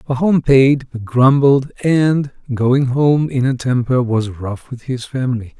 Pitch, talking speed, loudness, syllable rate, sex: 130 Hz, 160 wpm, -16 LUFS, 3.8 syllables/s, male